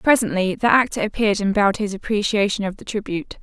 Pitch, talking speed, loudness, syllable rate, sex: 205 Hz, 195 wpm, -20 LUFS, 6.5 syllables/s, female